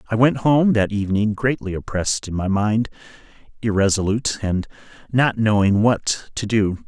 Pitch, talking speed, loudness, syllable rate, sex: 105 Hz, 150 wpm, -20 LUFS, 4.9 syllables/s, male